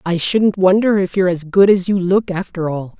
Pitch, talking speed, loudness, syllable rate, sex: 185 Hz, 240 wpm, -15 LUFS, 5.2 syllables/s, female